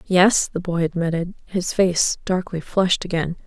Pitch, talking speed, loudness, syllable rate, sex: 175 Hz, 155 wpm, -21 LUFS, 4.5 syllables/s, female